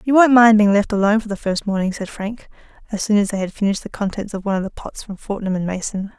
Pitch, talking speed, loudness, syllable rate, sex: 205 Hz, 280 wpm, -18 LUFS, 6.8 syllables/s, female